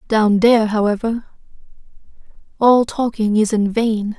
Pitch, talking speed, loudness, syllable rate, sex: 220 Hz, 100 wpm, -16 LUFS, 4.4 syllables/s, female